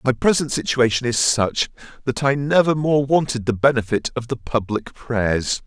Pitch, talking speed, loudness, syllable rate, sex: 125 Hz, 170 wpm, -20 LUFS, 4.7 syllables/s, male